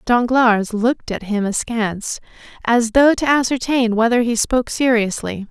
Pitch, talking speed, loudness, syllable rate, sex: 235 Hz, 140 wpm, -17 LUFS, 4.7 syllables/s, female